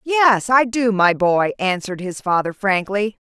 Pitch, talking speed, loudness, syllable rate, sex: 205 Hz, 165 wpm, -18 LUFS, 4.3 syllables/s, female